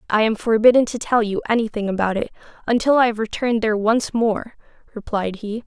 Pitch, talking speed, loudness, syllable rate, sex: 225 Hz, 190 wpm, -19 LUFS, 6.0 syllables/s, female